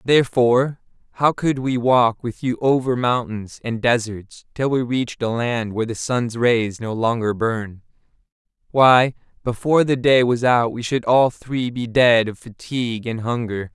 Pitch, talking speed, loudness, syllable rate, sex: 120 Hz, 170 wpm, -19 LUFS, 4.4 syllables/s, male